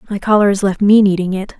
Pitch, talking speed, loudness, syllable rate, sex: 200 Hz, 265 wpm, -13 LUFS, 6.6 syllables/s, female